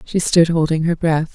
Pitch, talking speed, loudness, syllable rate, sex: 165 Hz, 225 wpm, -17 LUFS, 4.8 syllables/s, female